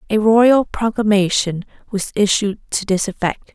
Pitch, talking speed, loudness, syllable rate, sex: 205 Hz, 135 wpm, -17 LUFS, 4.4 syllables/s, female